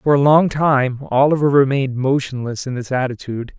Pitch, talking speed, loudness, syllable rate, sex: 135 Hz, 170 wpm, -17 LUFS, 5.5 syllables/s, male